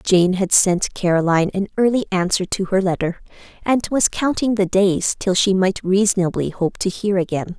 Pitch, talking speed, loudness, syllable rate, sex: 190 Hz, 180 wpm, -18 LUFS, 4.9 syllables/s, female